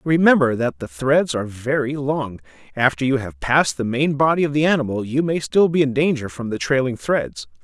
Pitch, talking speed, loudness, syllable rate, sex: 135 Hz, 210 wpm, -19 LUFS, 5.4 syllables/s, male